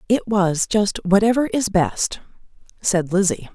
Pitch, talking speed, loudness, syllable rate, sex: 195 Hz, 135 wpm, -19 LUFS, 4.0 syllables/s, female